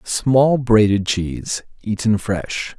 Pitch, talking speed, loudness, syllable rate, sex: 110 Hz, 110 wpm, -18 LUFS, 3.2 syllables/s, male